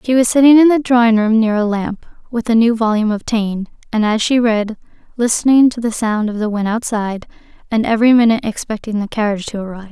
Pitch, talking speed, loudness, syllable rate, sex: 225 Hz, 220 wpm, -15 LUFS, 6.5 syllables/s, female